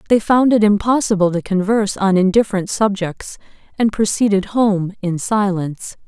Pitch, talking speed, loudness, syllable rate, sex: 200 Hz, 140 wpm, -16 LUFS, 5.0 syllables/s, female